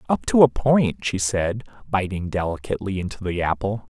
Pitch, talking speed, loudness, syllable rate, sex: 100 Hz, 165 wpm, -22 LUFS, 5.2 syllables/s, male